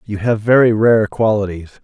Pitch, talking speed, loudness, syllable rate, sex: 110 Hz, 165 wpm, -14 LUFS, 4.9 syllables/s, male